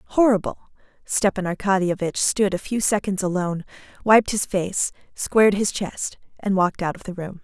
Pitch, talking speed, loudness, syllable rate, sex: 195 Hz, 160 wpm, -22 LUFS, 5.0 syllables/s, female